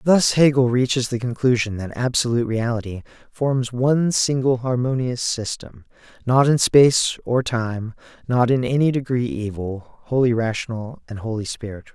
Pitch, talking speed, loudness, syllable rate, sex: 120 Hz, 140 wpm, -20 LUFS, 4.9 syllables/s, male